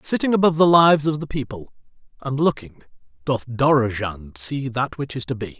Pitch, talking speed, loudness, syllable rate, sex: 135 Hz, 180 wpm, -20 LUFS, 5.5 syllables/s, male